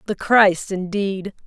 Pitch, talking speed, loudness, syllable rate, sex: 195 Hz, 125 wpm, -18 LUFS, 3.3 syllables/s, female